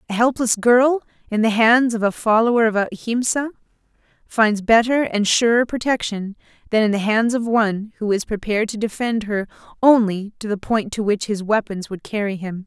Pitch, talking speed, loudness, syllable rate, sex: 220 Hz, 185 wpm, -19 LUFS, 5.2 syllables/s, female